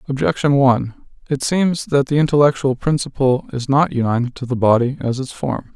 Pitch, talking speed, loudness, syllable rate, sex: 135 Hz, 175 wpm, -18 LUFS, 5.4 syllables/s, male